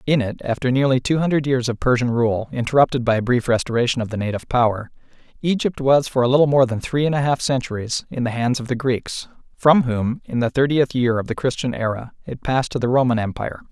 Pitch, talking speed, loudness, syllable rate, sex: 125 Hz, 225 wpm, -20 LUFS, 6.1 syllables/s, male